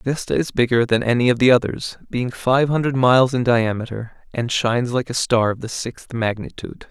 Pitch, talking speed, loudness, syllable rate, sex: 120 Hz, 200 wpm, -19 LUFS, 5.2 syllables/s, male